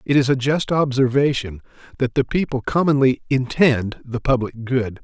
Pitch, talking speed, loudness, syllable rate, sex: 130 Hz, 155 wpm, -19 LUFS, 4.8 syllables/s, male